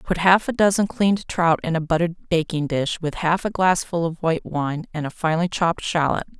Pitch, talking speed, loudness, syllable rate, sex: 170 Hz, 215 wpm, -21 LUFS, 5.6 syllables/s, female